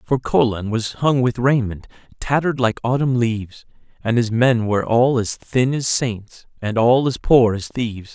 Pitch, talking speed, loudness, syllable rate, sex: 120 Hz, 185 wpm, -19 LUFS, 4.6 syllables/s, male